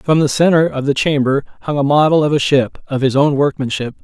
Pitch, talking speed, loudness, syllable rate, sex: 140 Hz, 240 wpm, -15 LUFS, 5.9 syllables/s, male